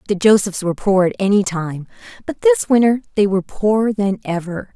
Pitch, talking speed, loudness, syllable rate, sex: 190 Hz, 190 wpm, -17 LUFS, 5.6 syllables/s, female